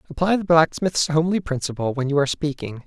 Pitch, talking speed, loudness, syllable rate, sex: 155 Hz, 190 wpm, -21 LUFS, 6.4 syllables/s, male